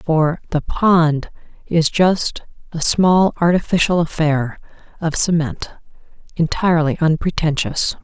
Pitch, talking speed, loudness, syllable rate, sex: 165 Hz, 95 wpm, -17 LUFS, 3.9 syllables/s, female